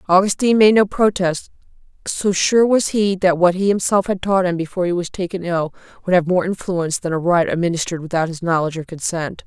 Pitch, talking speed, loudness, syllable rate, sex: 180 Hz, 210 wpm, -18 LUFS, 6.1 syllables/s, female